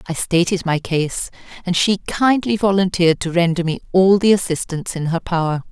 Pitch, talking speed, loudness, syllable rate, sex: 180 Hz, 180 wpm, -18 LUFS, 5.3 syllables/s, female